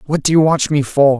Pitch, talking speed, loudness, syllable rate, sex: 145 Hz, 300 wpm, -14 LUFS, 5.5 syllables/s, male